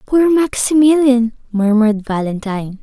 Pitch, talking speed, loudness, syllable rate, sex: 240 Hz, 85 wpm, -14 LUFS, 4.7 syllables/s, female